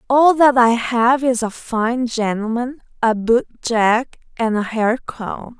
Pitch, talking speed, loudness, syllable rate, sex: 235 Hz, 160 wpm, -18 LUFS, 3.5 syllables/s, female